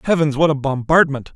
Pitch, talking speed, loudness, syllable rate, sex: 145 Hz, 175 wpm, -17 LUFS, 5.8 syllables/s, male